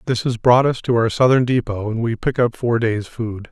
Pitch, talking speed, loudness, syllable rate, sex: 115 Hz, 255 wpm, -18 LUFS, 5.1 syllables/s, male